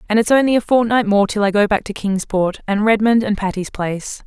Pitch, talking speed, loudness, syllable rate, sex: 210 Hz, 240 wpm, -17 LUFS, 5.7 syllables/s, female